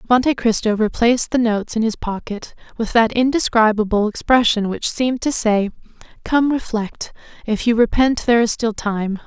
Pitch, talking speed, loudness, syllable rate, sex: 230 Hz, 160 wpm, -18 LUFS, 5.2 syllables/s, female